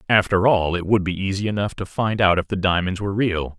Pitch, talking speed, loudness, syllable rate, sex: 95 Hz, 250 wpm, -20 LUFS, 5.9 syllables/s, male